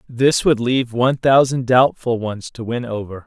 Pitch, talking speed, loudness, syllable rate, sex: 120 Hz, 185 wpm, -17 LUFS, 4.8 syllables/s, male